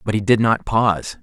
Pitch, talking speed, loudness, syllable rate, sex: 110 Hz, 245 wpm, -18 LUFS, 5.4 syllables/s, male